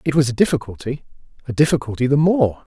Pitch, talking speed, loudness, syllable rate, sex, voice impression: 135 Hz, 155 wpm, -19 LUFS, 6.5 syllables/s, male, masculine, adult-like, tensed, powerful, clear, fluent, cool, intellectual, calm, friendly, slightly reassuring, slightly wild, lively, kind